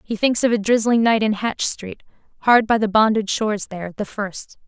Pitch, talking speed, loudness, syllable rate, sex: 215 Hz, 220 wpm, -19 LUFS, 5.3 syllables/s, female